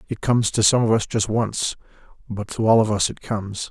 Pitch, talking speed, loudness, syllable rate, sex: 110 Hz, 245 wpm, -21 LUFS, 5.7 syllables/s, male